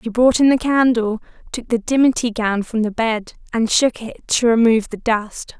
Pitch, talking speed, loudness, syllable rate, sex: 230 Hz, 205 wpm, -17 LUFS, 4.8 syllables/s, female